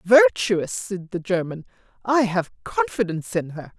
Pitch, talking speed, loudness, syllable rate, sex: 195 Hz, 145 wpm, -22 LUFS, 4.4 syllables/s, female